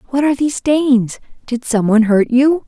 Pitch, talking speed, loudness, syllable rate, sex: 255 Hz, 200 wpm, -14 LUFS, 5.5 syllables/s, female